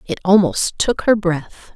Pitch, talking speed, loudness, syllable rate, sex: 185 Hz, 170 wpm, -17 LUFS, 3.8 syllables/s, female